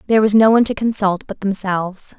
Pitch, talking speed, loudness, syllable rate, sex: 205 Hz, 220 wpm, -16 LUFS, 6.5 syllables/s, female